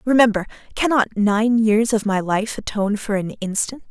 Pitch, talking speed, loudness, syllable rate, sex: 215 Hz, 170 wpm, -19 LUFS, 5.1 syllables/s, female